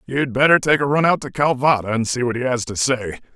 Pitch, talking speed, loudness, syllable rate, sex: 130 Hz, 270 wpm, -18 LUFS, 6.0 syllables/s, male